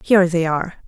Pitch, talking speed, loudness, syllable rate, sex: 175 Hz, 205 wpm, -18 LUFS, 7.6 syllables/s, female